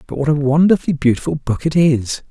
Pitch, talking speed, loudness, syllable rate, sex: 145 Hz, 210 wpm, -16 LUFS, 6.1 syllables/s, male